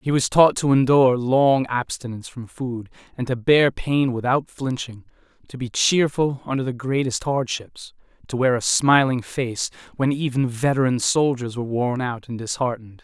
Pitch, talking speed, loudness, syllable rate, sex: 130 Hz, 165 wpm, -21 LUFS, 4.8 syllables/s, male